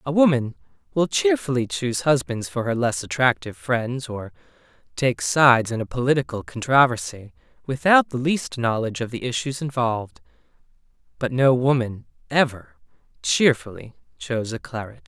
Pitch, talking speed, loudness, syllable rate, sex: 125 Hz, 130 wpm, -22 LUFS, 5.2 syllables/s, male